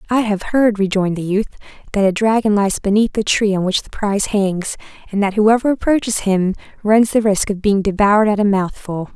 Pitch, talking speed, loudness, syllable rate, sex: 205 Hz, 210 wpm, -16 LUFS, 5.5 syllables/s, female